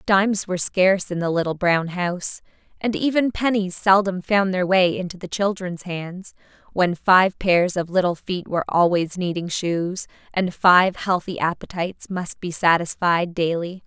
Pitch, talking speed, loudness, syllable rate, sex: 180 Hz, 160 wpm, -21 LUFS, 4.6 syllables/s, female